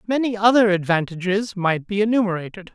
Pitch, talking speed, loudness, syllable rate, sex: 200 Hz, 130 wpm, -20 LUFS, 5.7 syllables/s, male